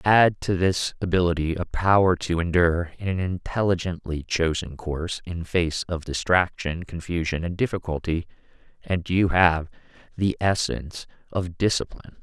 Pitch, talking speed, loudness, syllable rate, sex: 85 Hz, 130 wpm, -24 LUFS, 4.8 syllables/s, male